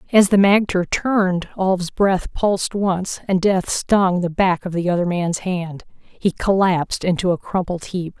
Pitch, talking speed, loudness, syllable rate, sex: 185 Hz, 175 wpm, -19 LUFS, 4.2 syllables/s, female